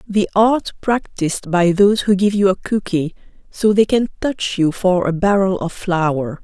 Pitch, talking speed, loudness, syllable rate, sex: 190 Hz, 185 wpm, -17 LUFS, 4.4 syllables/s, female